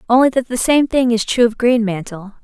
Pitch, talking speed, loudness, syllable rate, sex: 235 Hz, 220 wpm, -15 LUFS, 5.5 syllables/s, female